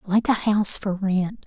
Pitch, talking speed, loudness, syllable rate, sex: 200 Hz, 205 wpm, -21 LUFS, 4.4 syllables/s, female